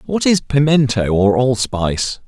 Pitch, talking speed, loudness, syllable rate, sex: 130 Hz, 130 wpm, -15 LUFS, 4.3 syllables/s, male